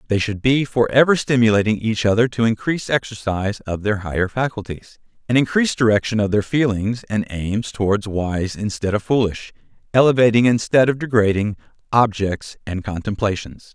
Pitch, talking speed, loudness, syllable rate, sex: 110 Hz, 155 wpm, -19 LUFS, 5.3 syllables/s, male